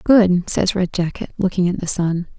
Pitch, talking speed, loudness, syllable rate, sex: 185 Hz, 200 wpm, -19 LUFS, 4.7 syllables/s, female